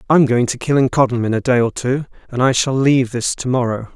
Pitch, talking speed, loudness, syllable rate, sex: 125 Hz, 245 wpm, -17 LUFS, 5.9 syllables/s, male